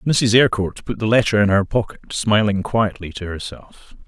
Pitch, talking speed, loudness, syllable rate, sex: 105 Hz, 175 wpm, -19 LUFS, 5.1 syllables/s, male